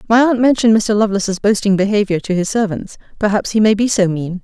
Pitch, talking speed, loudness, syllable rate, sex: 205 Hz, 215 wpm, -15 LUFS, 6.4 syllables/s, female